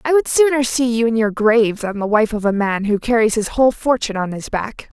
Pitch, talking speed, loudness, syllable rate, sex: 230 Hz, 265 wpm, -17 LUFS, 5.8 syllables/s, female